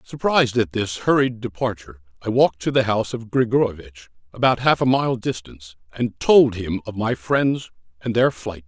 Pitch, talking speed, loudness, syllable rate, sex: 110 Hz, 180 wpm, -20 LUFS, 5.2 syllables/s, male